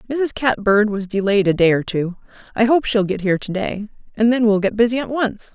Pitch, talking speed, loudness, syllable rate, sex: 215 Hz, 240 wpm, -18 LUFS, 5.5 syllables/s, female